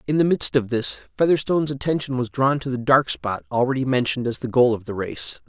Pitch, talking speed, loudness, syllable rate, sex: 130 Hz, 230 wpm, -22 LUFS, 6.0 syllables/s, male